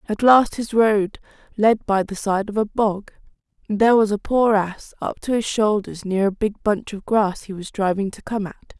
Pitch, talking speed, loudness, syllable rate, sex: 210 Hz, 225 wpm, -20 LUFS, 4.7 syllables/s, female